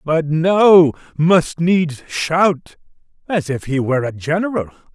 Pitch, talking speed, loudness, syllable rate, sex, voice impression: 160 Hz, 135 wpm, -16 LUFS, 3.6 syllables/s, male, masculine, slightly middle-aged, slightly thick, slightly intellectual, sincere, slightly wild, slightly kind